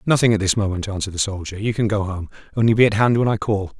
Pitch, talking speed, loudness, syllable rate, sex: 105 Hz, 285 wpm, -20 LUFS, 7.0 syllables/s, male